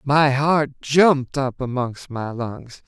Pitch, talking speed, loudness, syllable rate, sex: 135 Hz, 145 wpm, -20 LUFS, 3.4 syllables/s, male